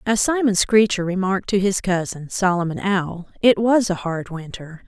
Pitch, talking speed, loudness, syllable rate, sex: 190 Hz, 170 wpm, -20 LUFS, 4.8 syllables/s, female